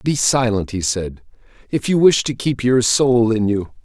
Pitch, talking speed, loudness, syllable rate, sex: 115 Hz, 205 wpm, -17 LUFS, 4.3 syllables/s, male